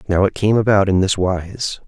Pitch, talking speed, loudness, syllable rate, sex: 100 Hz, 225 wpm, -17 LUFS, 4.8 syllables/s, male